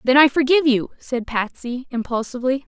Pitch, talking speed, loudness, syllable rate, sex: 260 Hz, 155 wpm, -20 LUFS, 5.5 syllables/s, female